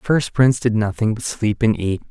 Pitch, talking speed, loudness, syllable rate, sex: 110 Hz, 255 wpm, -19 LUFS, 5.5 syllables/s, male